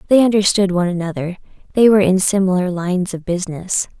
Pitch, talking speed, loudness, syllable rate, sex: 185 Hz, 150 wpm, -16 LUFS, 6.6 syllables/s, female